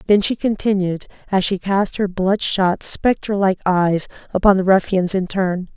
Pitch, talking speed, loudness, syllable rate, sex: 190 Hz, 175 wpm, -18 LUFS, 4.4 syllables/s, female